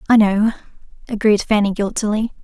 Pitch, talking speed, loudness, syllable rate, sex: 210 Hz, 125 wpm, -17 LUFS, 5.6 syllables/s, female